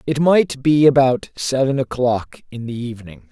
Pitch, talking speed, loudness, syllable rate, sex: 130 Hz, 165 wpm, -17 LUFS, 4.6 syllables/s, male